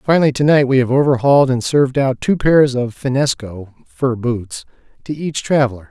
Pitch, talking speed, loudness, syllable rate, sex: 130 Hz, 185 wpm, -15 LUFS, 5.5 syllables/s, male